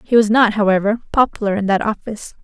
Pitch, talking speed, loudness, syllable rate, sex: 215 Hz, 200 wpm, -16 LUFS, 6.4 syllables/s, female